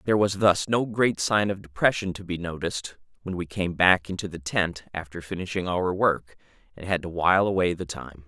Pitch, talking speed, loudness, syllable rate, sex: 90 Hz, 210 wpm, -25 LUFS, 5.4 syllables/s, male